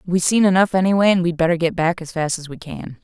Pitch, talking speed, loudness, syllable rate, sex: 175 Hz, 275 wpm, -18 LUFS, 6.6 syllables/s, female